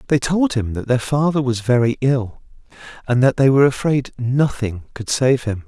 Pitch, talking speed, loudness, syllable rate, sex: 130 Hz, 190 wpm, -18 LUFS, 4.9 syllables/s, male